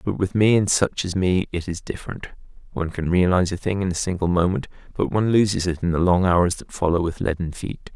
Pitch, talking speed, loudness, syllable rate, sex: 90 Hz, 240 wpm, -22 LUFS, 6.0 syllables/s, male